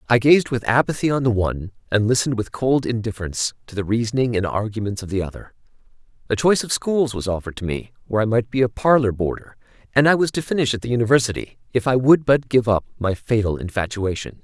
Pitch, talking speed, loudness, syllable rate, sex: 115 Hz, 215 wpm, -20 LUFS, 6.5 syllables/s, male